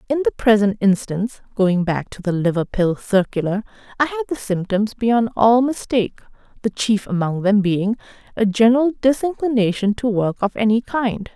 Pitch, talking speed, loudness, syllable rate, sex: 220 Hz, 165 wpm, -19 LUFS, 5.0 syllables/s, female